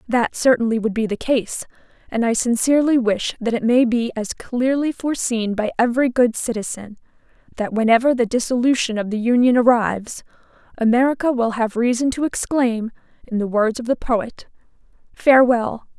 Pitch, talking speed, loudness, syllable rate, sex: 240 Hz, 160 wpm, -19 LUFS, 5.3 syllables/s, female